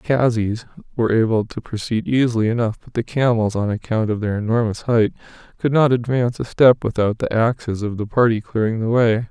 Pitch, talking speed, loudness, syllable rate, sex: 115 Hz, 200 wpm, -19 LUFS, 5.9 syllables/s, male